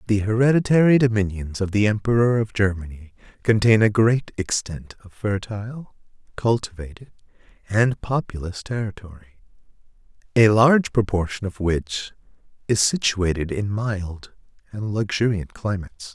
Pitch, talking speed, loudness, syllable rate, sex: 105 Hz, 110 wpm, -21 LUFS, 4.8 syllables/s, male